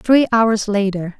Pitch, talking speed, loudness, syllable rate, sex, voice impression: 215 Hz, 150 wpm, -16 LUFS, 3.7 syllables/s, female, very feminine, adult-like, slightly middle-aged, very thin, slightly relaxed, slightly weak, slightly dark, slightly soft, very clear, fluent, cute, intellectual, refreshing, sincere, slightly calm, reassuring, very unique, very elegant, sweet, very kind, slightly modest